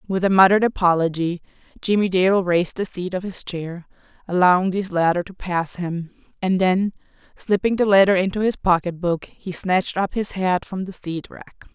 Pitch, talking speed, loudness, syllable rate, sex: 185 Hz, 175 wpm, -20 LUFS, 5.2 syllables/s, female